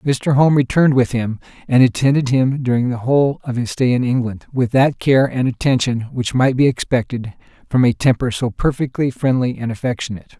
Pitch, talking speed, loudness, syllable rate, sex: 125 Hz, 190 wpm, -17 LUFS, 5.4 syllables/s, male